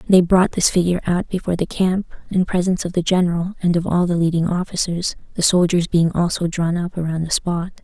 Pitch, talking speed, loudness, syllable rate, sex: 175 Hz, 215 wpm, -19 LUFS, 5.9 syllables/s, female